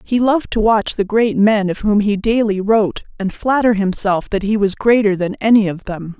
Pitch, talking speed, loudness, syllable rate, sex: 210 Hz, 225 wpm, -16 LUFS, 5.1 syllables/s, female